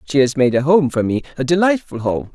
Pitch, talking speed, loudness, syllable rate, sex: 145 Hz, 230 wpm, -17 LUFS, 5.9 syllables/s, male